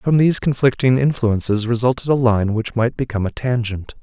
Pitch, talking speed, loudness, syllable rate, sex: 120 Hz, 180 wpm, -18 LUFS, 5.6 syllables/s, male